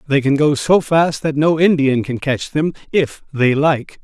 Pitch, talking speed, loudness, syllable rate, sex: 145 Hz, 195 wpm, -16 LUFS, 4.2 syllables/s, male